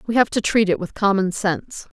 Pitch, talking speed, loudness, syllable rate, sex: 200 Hz, 240 wpm, -20 LUFS, 5.7 syllables/s, female